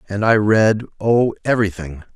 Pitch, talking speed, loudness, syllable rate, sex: 105 Hz, 140 wpm, -17 LUFS, 5.0 syllables/s, male